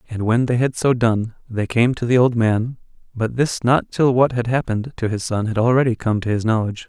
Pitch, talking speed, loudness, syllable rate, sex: 120 Hz, 245 wpm, -19 LUFS, 5.5 syllables/s, male